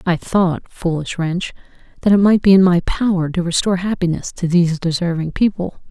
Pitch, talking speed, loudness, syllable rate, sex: 180 Hz, 185 wpm, -17 LUFS, 5.5 syllables/s, female